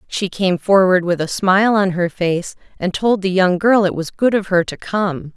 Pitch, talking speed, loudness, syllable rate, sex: 190 Hz, 235 wpm, -17 LUFS, 4.7 syllables/s, female